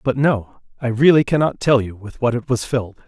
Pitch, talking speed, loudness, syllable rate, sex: 120 Hz, 215 wpm, -18 LUFS, 5.8 syllables/s, male